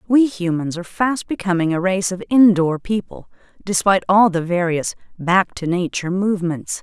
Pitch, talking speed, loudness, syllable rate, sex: 185 Hz, 160 wpm, -18 LUFS, 5.2 syllables/s, female